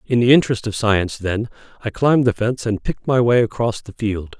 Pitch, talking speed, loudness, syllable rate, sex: 115 Hz, 230 wpm, -18 LUFS, 6.2 syllables/s, male